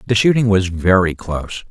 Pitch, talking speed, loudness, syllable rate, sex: 100 Hz, 175 wpm, -16 LUFS, 5.4 syllables/s, male